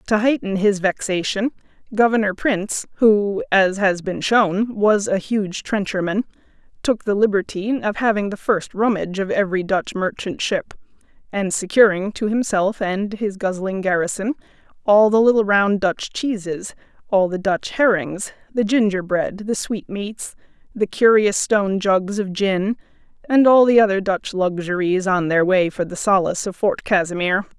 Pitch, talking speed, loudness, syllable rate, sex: 200 Hz, 155 wpm, -19 LUFS, 4.5 syllables/s, female